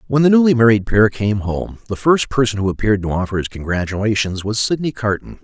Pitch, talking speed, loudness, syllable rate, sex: 110 Hz, 210 wpm, -17 LUFS, 6.0 syllables/s, male